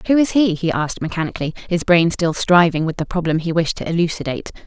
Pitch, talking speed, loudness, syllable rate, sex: 170 Hz, 220 wpm, -18 LUFS, 6.7 syllables/s, female